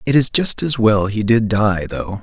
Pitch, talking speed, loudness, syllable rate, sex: 110 Hz, 245 wpm, -16 LUFS, 4.4 syllables/s, male